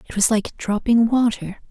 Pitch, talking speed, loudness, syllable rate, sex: 220 Hz, 175 wpm, -19 LUFS, 4.7 syllables/s, female